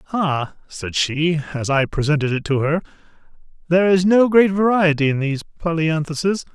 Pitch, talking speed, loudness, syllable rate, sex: 160 Hz, 155 wpm, -18 LUFS, 5.3 syllables/s, male